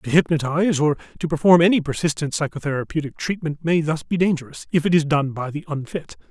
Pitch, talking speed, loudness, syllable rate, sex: 155 Hz, 190 wpm, -21 LUFS, 6.2 syllables/s, male